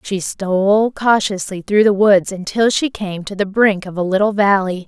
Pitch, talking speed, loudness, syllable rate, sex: 200 Hz, 195 wpm, -16 LUFS, 4.6 syllables/s, female